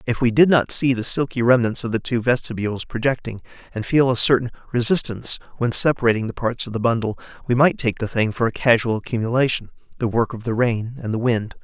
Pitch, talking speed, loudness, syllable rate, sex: 120 Hz, 215 wpm, -20 LUFS, 6.1 syllables/s, male